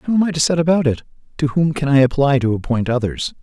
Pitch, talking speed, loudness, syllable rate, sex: 140 Hz, 265 wpm, -17 LUFS, 6.3 syllables/s, male